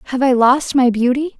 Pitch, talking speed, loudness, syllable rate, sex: 260 Hz, 215 wpm, -15 LUFS, 5.3 syllables/s, female